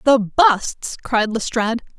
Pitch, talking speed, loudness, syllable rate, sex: 235 Hz, 120 wpm, -18 LUFS, 3.7 syllables/s, female